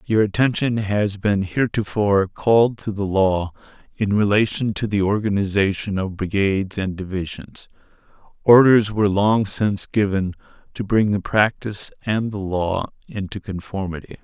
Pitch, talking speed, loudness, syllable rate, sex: 100 Hz, 130 wpm, -20 LUFS, 4.8 syllables/s, male